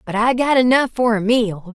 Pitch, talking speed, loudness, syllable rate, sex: 230 Hz, 240 wpm, -17 LUFS, 5.0 syllables/s, female